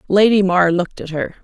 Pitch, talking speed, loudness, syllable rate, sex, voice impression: 185 Hz, 210 wpm, -16 LUFS, 5.9 syllables/s, female, feminine, middle-aged, tensed, powerful, slightly muffled, raspy, calm, slightly mature, slightly reassuring, slightly strict, slightly sharp